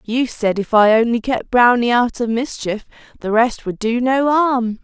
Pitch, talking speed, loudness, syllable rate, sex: 235 Hz, 200 wpm, -16 LUFS, 4.4 syllables/s, female